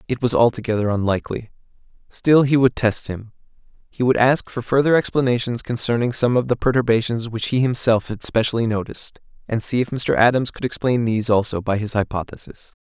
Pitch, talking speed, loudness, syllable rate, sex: 120 Hz, 180 wpm, -20 LUFS, 5.8 syllables/s, male